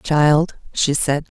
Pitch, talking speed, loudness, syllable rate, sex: 150 Hz, 130 wpm, -18 LUFS, 2.7 syllables/s, female